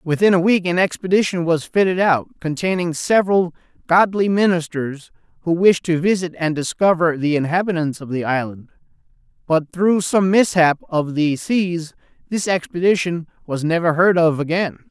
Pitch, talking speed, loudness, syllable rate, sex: 170 Hz, 150 wpm, -18 LUFS, 4.9 syllables/s, male